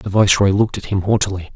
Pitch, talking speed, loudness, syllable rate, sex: 100 Hz, 230 wpm, -16 LUFS, 7.3 syllables/s, male